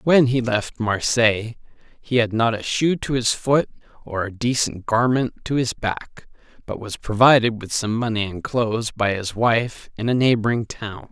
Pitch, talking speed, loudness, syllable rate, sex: 115 Hz, 185 wpm, -21 LUFS, 4.5 syllables/s, male